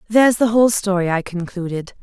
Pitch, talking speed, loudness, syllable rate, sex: 200 Hz, 180 wpm, -18 LUFS, 6.1 syllables/s, female